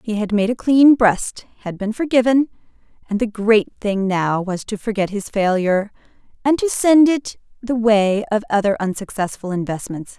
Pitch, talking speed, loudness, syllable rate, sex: 215 Hz, 170 wpm, -18 LUFS, 4.8 syllables/s, female